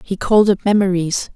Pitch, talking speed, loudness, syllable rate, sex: 195 Hz, 175 wpm, -16 LUFS, 5.7 syllables/s, female